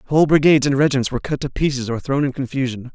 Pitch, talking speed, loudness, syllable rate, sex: 135 Hz, 245 wpm, -18 LUFS, 7.6 syllables/s, male